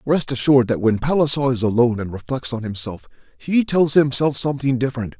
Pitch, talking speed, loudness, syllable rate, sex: 130 Hz, 185 wpm, -19 LUFS, 6.1 syllables/s, male